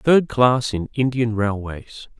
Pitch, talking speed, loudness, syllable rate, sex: 120 Hz, 135 wpm, -20 LUFS, 3.4 syllables/s, male